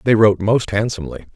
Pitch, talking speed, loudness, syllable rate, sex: 105 Hz, 180 wpm, -17 LUFS, 6.9 syllables/s, male